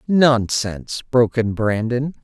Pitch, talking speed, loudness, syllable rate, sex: 125 Hz, 105 wpm, -19 LUFS, 4.2 syllables/s, male